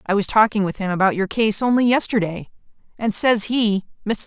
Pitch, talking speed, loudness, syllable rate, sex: 210 Hz, 195 wpm, -19 LUFS, 4.9 syllables/s, female